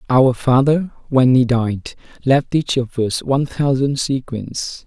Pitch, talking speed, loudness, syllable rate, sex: 130 Hz, 150 wpm, -17 LUFS, 3.8 syllables/s, male